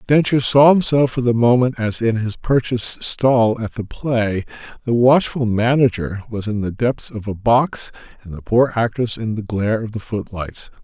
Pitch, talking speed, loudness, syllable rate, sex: 115 Hz, 190 wpm, -18 LUFS, 4.6 syllables/s, male